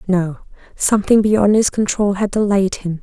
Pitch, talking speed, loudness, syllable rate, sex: 200 Hz, 160 wpm, -16 LUFS, 4.8 syllables/s, female